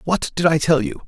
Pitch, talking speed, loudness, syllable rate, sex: 165 Hz, 280 wpm, -18 LUFS, 5.6 syllables/s, male